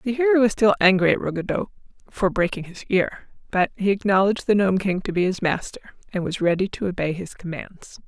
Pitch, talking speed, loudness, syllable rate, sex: 195 Hz, 210 wpm, -22 LUFS, 5.6 syllables/s, female